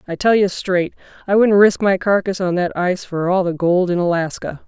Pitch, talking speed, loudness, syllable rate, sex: 185 Hz, 230 wpm, -17 LUFS, 5.3 syllables/s, female